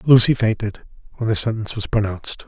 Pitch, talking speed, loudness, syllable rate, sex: 110 Hz, 170 wpm, -20 LUFS, 6.5 syllables/s, male